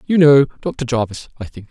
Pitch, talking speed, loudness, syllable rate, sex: 135 Hz, 210 wpm, -16 LUFS, 5.3 syllables/s, male